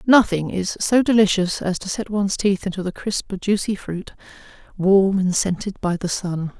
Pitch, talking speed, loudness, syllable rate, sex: 195 Hz, 180 wpm, -20 LUFS, 4.8 syllables/s, female